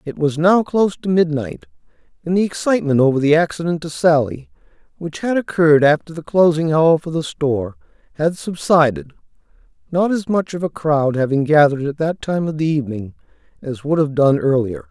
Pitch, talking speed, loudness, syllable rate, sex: 155 Hz, 180 wpm, -17 LUFS, 5.6 syllables/s, male